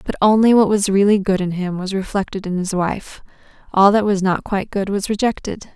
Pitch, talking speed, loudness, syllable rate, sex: 195 Hz, 220 wpm, -17 LUFS, 5.5 syllables/s, female